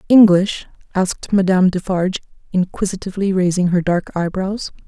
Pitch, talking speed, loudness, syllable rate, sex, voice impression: 185 Hz, 110 wpm, -17 LUFS, 5.5 syllables/s, female, feminine, adult-like, slightly hard, clear, fluent, intellectual, elegant, slightly strict, sharp